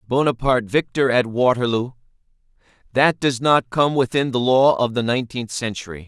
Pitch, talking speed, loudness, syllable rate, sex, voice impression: 125 Hz, 150 wpm, -19 LUFS, 5.3 syllables/s, male, masculine, middle-aged, tensed, powerful, bright, clear, slightly nasal, mature, unique, wild, lively, slightly intense